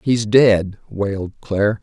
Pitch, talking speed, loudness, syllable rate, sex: 105 Hz, 130 wpm, -17 LUFS, 3.9 syllables/s, male